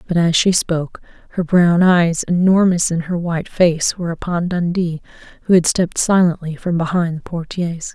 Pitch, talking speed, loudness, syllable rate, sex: 170 Hz, 175 wpm, -17 LUFS, 5.2 syllables/s, female